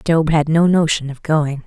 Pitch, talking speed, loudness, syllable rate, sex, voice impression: 155 Hz, 250 wpm, -16 LUFS, 5.2 syllables/s, female, feminine, soft, calm, sweet, kind